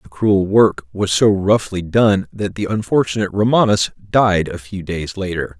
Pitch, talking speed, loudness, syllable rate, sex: 100 Hz, 170 wpm, -17 LUFS, 4.4 syllables/s, male